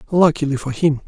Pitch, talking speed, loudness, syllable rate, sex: 145 Hz, 165 wpm, -18 LUFS, 6.0 syllables/s, male